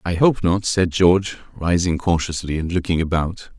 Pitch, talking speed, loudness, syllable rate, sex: 90 Hz, 165 wpm, -19 LUFS, 4.9 syllables/s, male